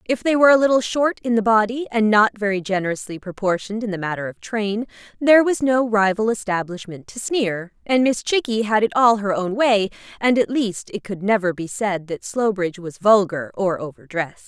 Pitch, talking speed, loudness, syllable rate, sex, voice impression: 210 Hz, 205 wpm, -20 LUFS, 5.4 syllables/s, female, very feminine, adult-like, slightly fluent, intellectual, slightly elegant